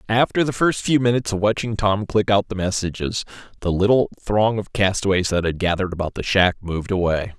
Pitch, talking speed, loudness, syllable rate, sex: 100 Hz, 205 wpm, -20 LUFS, 5.9 syllables/s, male